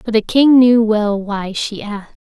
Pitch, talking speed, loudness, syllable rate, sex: 220 Hz, 215 wpm, -14 LUFS, 4.4 syllables/s, female